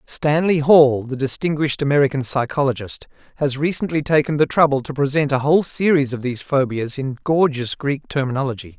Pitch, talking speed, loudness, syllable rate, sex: 140 Hz, 155 wpm, -19 LUFS, 5.7 syllables/s, male